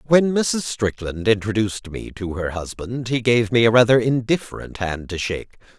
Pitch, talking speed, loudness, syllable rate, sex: 115 Hz, 175 wpm, -20 LUFS, 5.0 syllables/s, male